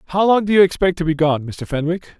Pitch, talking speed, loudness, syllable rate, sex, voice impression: 170 Hz, 275 wpm, -17 LUFS, 6.6 syllables/s, male, very masculine, slightly old, thick, tensed, very powerful, bright, slightly soft, slightly muffled, fluent, slightly raspy, cool, intellectual, refreshing, sincere, slightly calm, mature, friendly, reassuring, unique, slightly elegant, wild, slightly sweet, lively, kind, slightly modest